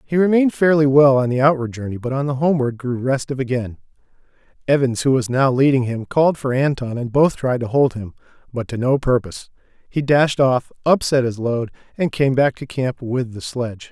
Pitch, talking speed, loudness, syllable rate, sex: 130 Hz, 205 wpm, -18 LUFS, 5.6 syllables/s, male